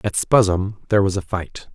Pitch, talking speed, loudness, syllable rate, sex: 95 Hz, 205 wpm, -19 LUFS, 5.2 syllables/s, male